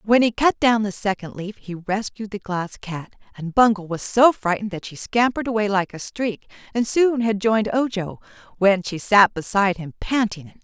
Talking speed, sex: 210 wpm, female